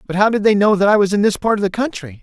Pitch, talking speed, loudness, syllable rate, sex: 200 Hz, 380 wpm, -15 LUFS, 7.0 syllables/s, male